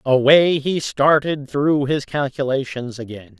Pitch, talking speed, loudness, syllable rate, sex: 140 Hz, 125 wpm, -18 LUFS, 4.0 syllables/s, male